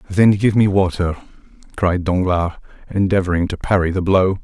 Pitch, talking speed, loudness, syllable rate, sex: 95 Hz, 150 wpm, -17 LUFS, 5.2 syllables/s, male